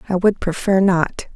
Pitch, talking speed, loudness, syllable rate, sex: 185 Hz, 175 wpm, -18 LUFS, 4.5 syllables/s, female